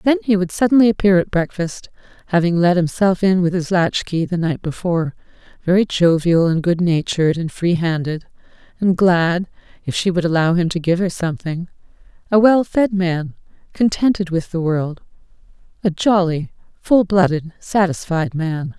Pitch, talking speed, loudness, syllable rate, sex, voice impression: 175 Hz, 155 wpm, -18 LUFS, 4.9 syllables/s, female, very feminine, very adult-like, middle-aged, very thin, relaxed, slightly weak, slightly dark, very soft, very clear, fluent, very cute, very intellectual, refreshing, very sincere, very calm, very friendly, very reassuring, very unique, very elegant, very sweet, slightly lively, very kind, very modest